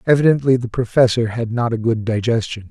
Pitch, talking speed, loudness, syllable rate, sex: 115 Hz, 175 wpm, -18 LUFS, 5.8 syllables/s, male